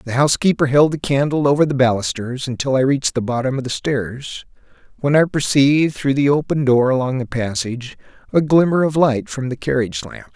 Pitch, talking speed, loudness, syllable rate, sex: 130 Hz, 195 wpm, -17 LUFS, 5.6 syllables/s, male